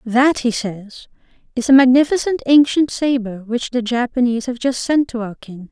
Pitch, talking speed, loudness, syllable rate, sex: 245 Hz, 180 wpm, -17 LUFS, 5.0 syllables/s, female